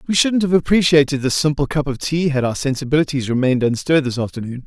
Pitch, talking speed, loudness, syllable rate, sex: 145 Hz, 205 wpm, -18 LUFS, 6.7 syllables/s, male